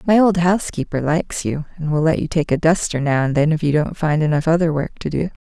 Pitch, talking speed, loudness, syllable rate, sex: 160 Hz, 265 wpm, -18 LUFS, 6.1 syllables/s, female